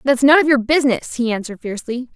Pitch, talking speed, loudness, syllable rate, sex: 255 Hz, 220 wpm, -17 LUFS, 6.9 syllables/s, female